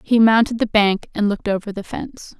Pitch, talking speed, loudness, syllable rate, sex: 215 Hz, 225 wpm, -18 LUFS, 5.8 syllables/s, female